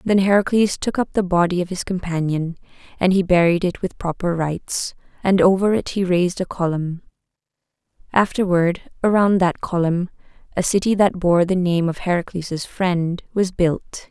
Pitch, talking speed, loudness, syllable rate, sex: 180 Hz, 160 wpm, -20 LUFS, 4.8 syllables/s, female